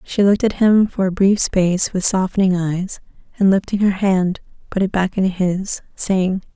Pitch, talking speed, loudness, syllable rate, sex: 190 Hz, 190 wpm, -18 LUFS, 4.7 syllables/s, female